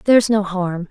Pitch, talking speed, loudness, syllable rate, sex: 195 Hz, 200 wpm, -17 LUFS, 4.6 syllables/s, female